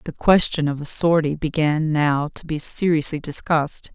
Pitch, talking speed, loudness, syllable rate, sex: 155 Hz, 165 wpm, -20 LUFS, 4.8 syllables/s, female